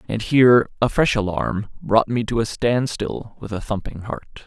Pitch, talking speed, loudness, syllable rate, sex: 115 Hz, 190 wpm, -20 LUFS, 4.7 syllables/s, male